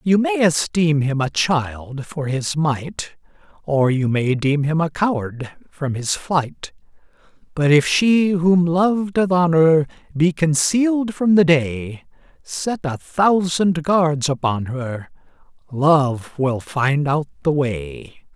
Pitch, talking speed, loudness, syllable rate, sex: 155 Hz, 140 wpm, -19 LUFS, 3.2 syllables/s, male